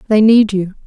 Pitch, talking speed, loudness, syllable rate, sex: 210 Hz, 210 wpm, -12 LUFS, 5.2 syllables/s, female